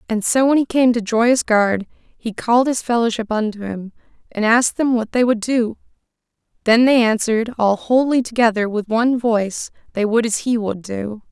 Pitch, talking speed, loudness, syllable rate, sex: 230 Hz, 190 wpm, -18 LUFS, 5.0 syllables/s, female